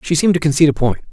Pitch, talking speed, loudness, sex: 145 Hz, 320 wpm, -15 LUFS, male